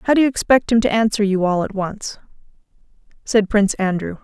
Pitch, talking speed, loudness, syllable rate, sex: 210 Hz, 200 wpm, -18 LUFS, 5.8 syllables/s, female